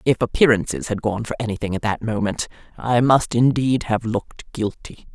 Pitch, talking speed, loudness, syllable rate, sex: 110 Hz, 175 wpm, -21 LUFS, 5.2 syllables/s, female